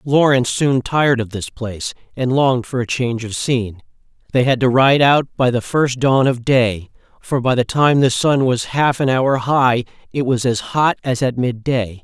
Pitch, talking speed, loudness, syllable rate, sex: 125 Hz, 220 wpm, -17 LUFS, 4.7 syllables/s, male